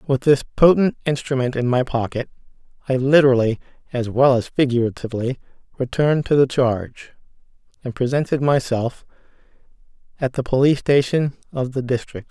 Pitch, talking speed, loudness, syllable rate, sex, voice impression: 130 Hz, 130 wpm, -19 LUFS, 5.5 syllables/s, male, very masculine, very adult-like, very middle-aged, very thick, slightly relaxed, slightly weak, slightly dark, slightly soft, muffled, slightly halting, slightly raspy, cool, intellectual, slightly refreshing, sincere, calm, very mature, friendly, very reassuring, wild, slightly sweet, kind, modest